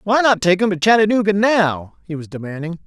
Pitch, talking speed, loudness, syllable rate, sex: 190 Hz, 210 wpm, -16 LUFS, 5.6 syllables/s, male